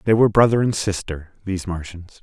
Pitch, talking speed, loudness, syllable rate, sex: 95 Hz, 190 wpm, -20 LUFS, 6.1 syllables/s, male